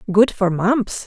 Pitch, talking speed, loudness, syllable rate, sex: 205 Hz, 170 wpm, -18 LUFS, 3.3 syllables/s, female